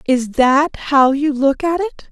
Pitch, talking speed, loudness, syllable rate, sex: 285 Hz, 200 wpm, -15 LUFS, 3.7 syllables/s, female